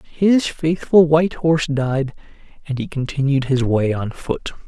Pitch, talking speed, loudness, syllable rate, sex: 145 Hz, 155 wpm, -19 LUFS, 4.4 syllables/s, male